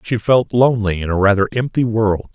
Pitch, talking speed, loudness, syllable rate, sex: 110 Hz, 205 wpm, -16 LUFS, 5.5 syllables/s, male